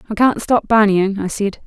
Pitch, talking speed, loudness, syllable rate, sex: 205 Hz, 215 wpm, -16 LUFS, 5.0 syllables/s, female